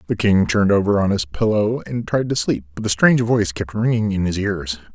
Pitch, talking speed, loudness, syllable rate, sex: 100 Hz, 245 wpm, -19 LUFS, 5.7 syllables/s, male